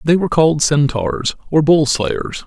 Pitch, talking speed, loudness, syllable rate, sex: 135 Hz, 170 wpm, -15 LUFS, 4.4 syllables/s, male